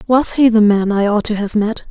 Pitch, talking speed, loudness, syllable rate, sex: 215 Hz, 285 wpm, -14 LUFS, 5.2 syllables/s, female